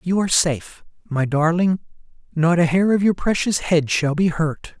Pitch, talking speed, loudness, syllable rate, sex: 170 Hz, 190 wpm, -19 LUFS, 4.8 syllables/s, male